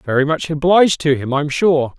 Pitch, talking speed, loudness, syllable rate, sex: 150 Hz, 210 wpm, -15 LUFS, 5.2 syllables/s, male